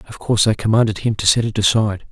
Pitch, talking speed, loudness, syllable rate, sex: 110 Hz, 255 wpm, -17 LUFS, 7.4 syllables/s, male